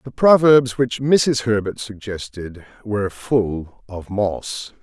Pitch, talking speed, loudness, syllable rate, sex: 110 Hz, 125 wpm, -19 LUFS, 3.4 syllables/s, male